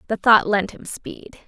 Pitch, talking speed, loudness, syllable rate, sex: 210 Hz, 205 wpm, -18 LUFS, 4.1 syllables/s, female